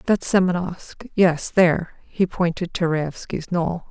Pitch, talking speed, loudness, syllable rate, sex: 175 Hz, 140 wpm, -21 LUFS, 3.9 syllables/s, female